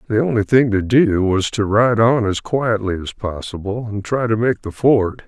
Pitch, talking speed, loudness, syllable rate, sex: 110 Hz, 215 wpm, -17 LUFS, 4.6 syllables/s, male